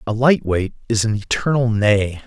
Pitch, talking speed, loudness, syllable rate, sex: 110 Hz, 185 wpm, -18 LUFS, 4.6 syllables/s, male